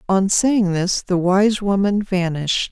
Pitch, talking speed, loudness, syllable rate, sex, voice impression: 190 Hz, 155 wpm, -18 LUFS, 4.0 syllables/s, female, feminine, adult-like, tensed, slightly weak, slightly soft, halting, calm, slightly reassuring, elegant, slightly sharp, modest